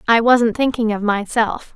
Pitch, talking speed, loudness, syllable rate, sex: 225 Hz, 170 wpm, -17 LUFS, 4.4 syllables/s, female